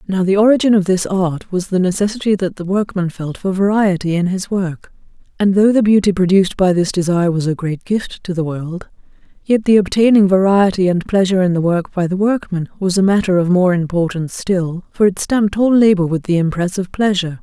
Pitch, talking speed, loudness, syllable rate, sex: 190 Hz, 215 wpm, -15 LUFS, 5.7 syllables/s, female